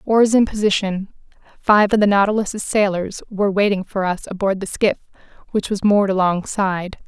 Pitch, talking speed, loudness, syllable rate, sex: 200 Hz, 160 wpm, -18 LUFS, 5.3 syllables/s, female